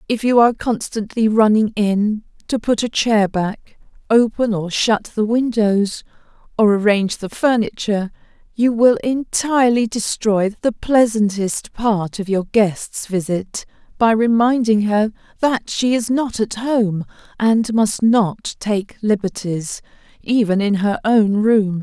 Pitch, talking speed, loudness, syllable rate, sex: 215 Hz, 135 wpm, -17 LUFS, 3.9 syllables/s, female